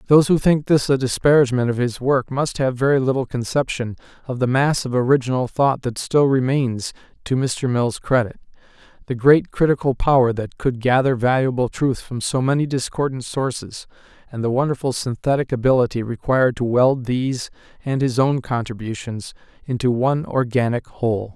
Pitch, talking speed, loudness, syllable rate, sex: 130 Hz, 165 wpm, -20 LUFS, 5.3 syllables/s, male